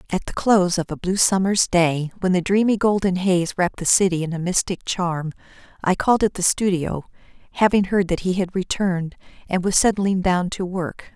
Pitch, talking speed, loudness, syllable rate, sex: 185 Hz, 200 wpm, -20 LUFS, 5.3 syllables/s, female